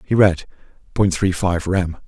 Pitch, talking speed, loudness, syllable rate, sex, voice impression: 90 Hz, 175 wpm, -19 LUFS, 4.2 syllables/s, male, masculine, adult-like, slightly thick, fluent, cool, intellectual, slightly calm, slightly strict